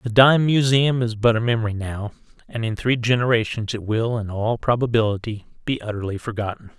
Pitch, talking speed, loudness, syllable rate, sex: 115 Hz, 175 wpm, -21 LUFS, 5.6 syllables/s, male